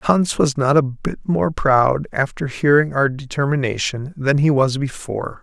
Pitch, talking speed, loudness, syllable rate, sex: 135 Hz, 165 wpm, -18 LUFS, 4.4 syllables/s, male